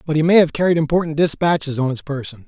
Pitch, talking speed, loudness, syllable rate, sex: 155 Hz, 245 wpm, -18 LUFS, 6.9 syllables/s, male